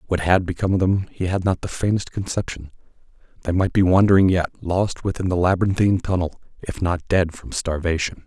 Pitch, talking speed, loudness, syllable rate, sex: 90 Hz, 180 wpm, -21 LUFS, 5.9 syllables/s, male